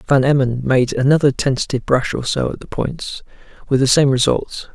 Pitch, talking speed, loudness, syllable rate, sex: 135 Hz, 190 wpm, -17 LUFS, 5.6 syllables/s, male